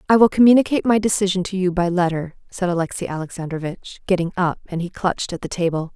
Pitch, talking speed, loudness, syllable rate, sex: 180 Hz, 200 wpm, -20 LUFS, 6.6 syllables/s, female